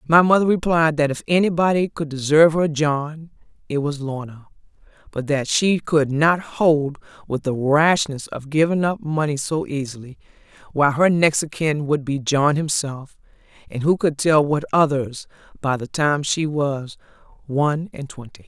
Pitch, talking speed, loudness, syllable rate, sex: 150 Hz, 165 wpm, -20 LUFS, 4.6 syllables/s, female